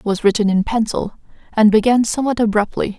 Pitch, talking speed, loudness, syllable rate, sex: 220 Hz, 180 wpm, -17 LUFS, 6.1 syllables/s, female